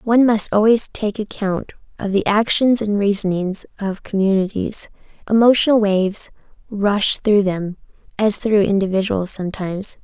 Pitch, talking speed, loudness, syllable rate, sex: 205 Hz, 125 wpm, -18 LUFS, 4.8 syllables/s, female